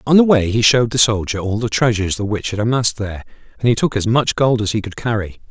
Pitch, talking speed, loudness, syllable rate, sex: 110 Hz, 270 wpm, -17 LUFS, 6.7 syllables/s, male